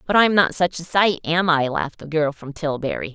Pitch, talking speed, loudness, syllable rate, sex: 160 Hz, 250 wpm, -20 LUFS, 5.4 syllables/s, female